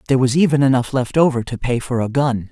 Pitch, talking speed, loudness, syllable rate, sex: 130 Hz, 260 wpm, -17 LUFS, 6.4 syllables/s, male